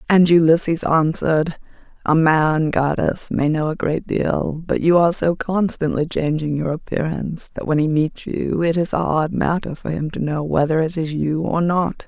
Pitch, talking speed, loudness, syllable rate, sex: 160 Hz, 195 wpm, -19 LUFS, 4.7 syllables/s, female